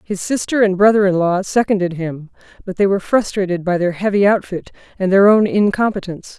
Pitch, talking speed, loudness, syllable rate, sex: 195 Hz, 190 wpm, -16 LUFS, 5.8 syllables/s, female